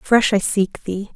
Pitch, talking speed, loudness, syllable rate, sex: 205 Hz, 210 wpm, -19 LUFS, 4.6 syllables/s, female